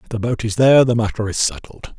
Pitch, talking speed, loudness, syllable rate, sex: 115 Hz, 270 wpm, -17 LUFS, 6.5 syllables/s, male